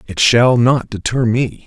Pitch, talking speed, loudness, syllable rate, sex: 120 Hz, 180 wpm, -14 LUFS, 4.0 syllables/s, male